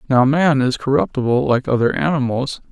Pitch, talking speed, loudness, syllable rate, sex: 135 Hz, 155 wpm, -17 LUFS, 5.3 syllables/s, male